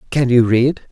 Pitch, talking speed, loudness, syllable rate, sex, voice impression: 125 Hz, 195 wpm, -14 LUFS, 5.0 syllables/s, male, masculine, adult-like, slightly sincere, friendly, kind